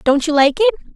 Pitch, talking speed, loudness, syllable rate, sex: 325 Hz, 255 wpm, -15 LUFS, 6.9 syllables/s, female